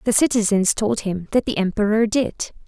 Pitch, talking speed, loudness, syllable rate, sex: 210 Hz, 180 wpm, -20 LUFS, 5.4 syllables/s, female